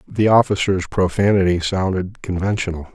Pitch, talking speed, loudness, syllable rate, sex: 95 Hz, 100 wpm, -18 LUFS, 5.1 syllables/s, male